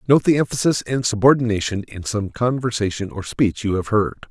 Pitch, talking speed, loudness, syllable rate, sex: 110 Hz, 180 wpm, -20 LUFS, 5.5 syllables/s, male